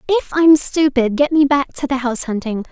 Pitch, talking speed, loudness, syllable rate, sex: 275 Hz, 220 wpm, -16 LUFS, 6.0 syllables/s, female